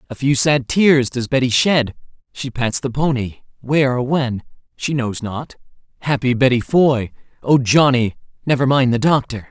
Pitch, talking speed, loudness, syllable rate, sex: 130 Hz, 165 wpm, -17 LUFS, 4.6 syllables/s, male